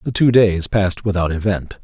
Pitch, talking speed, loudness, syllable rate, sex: 100 Hz, 195 wpm, -17 LUFS, 5.3 syllables/s, male